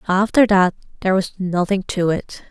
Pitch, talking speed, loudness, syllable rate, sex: 190 Hz, 170 wpm, -18 LUFS, 5.1 syllables/s, female